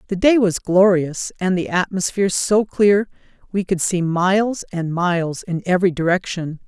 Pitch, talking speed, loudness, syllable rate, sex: 185 Hz, 160 wpm, -19 LUFS, 4.8 syllables/s, female